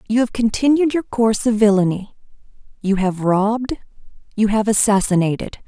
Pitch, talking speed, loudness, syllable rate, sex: 215 Hz, 125 wpm, -18 LUFS, 5.3 syllables/s, female